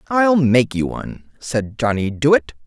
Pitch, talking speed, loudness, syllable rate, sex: 130 Hz, 160 wpm, -18 LUFS, 3.8 syllables/s, male